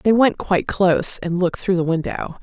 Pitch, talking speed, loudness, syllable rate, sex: 185 Hz, 225 wpm, -19 LUFS, 5.5 syllables/s, female